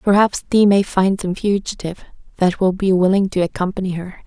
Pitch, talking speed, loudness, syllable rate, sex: 190 Hz, 185 wpm, -18 LUFS, 5.7 syllables/s, female